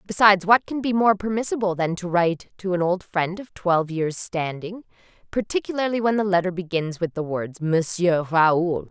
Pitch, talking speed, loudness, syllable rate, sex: 185 Hz, 180 wpm, -22 LUFS, 5.2 syllables/s, female